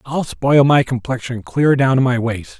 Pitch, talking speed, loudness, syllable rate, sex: 125 Hz, 210 wpm, -16 LUFS, 4.4 syllables/s, male